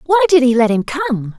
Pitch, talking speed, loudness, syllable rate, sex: 270 Hz, 260 wpm, -14 LUFS, 4.8 syllables/s, female